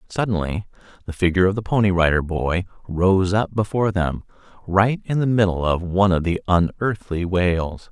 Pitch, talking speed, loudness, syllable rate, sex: 95 Hz, 165 wpm, -20 LUFS, 5.3 syllables/s, male